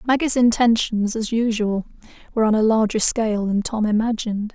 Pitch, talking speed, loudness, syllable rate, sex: 220 Hz, 160 wpm, -20 LUFS, 5.6 syllables/s, female